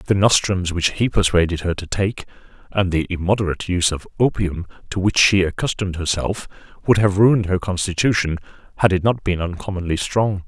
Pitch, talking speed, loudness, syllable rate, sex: 95 Hz, 170 wpm, -19 LUFS, 5.7 syllables/s, male